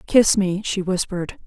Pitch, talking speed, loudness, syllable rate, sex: 195 Hz, 165 wpm, -20 LUFS, 4.8 syllables/s, female